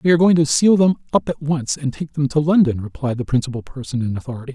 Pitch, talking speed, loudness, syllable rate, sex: 140 Hz, 265 wpm, -19 LUFS, 6.8 syllables/s, male